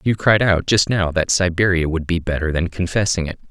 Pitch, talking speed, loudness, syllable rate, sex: 90 Hz, 225 wpm, -18 LUFS, 5.4 syllables/s, male